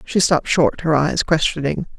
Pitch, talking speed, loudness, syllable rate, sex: 155 Hz, 180 wpm, -18 LUFS, 5.0 syllables/s, female